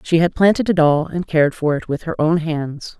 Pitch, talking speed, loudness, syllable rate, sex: 160 Hz, 260 wpm, -18 LUFS, 5.2 syllables/s, female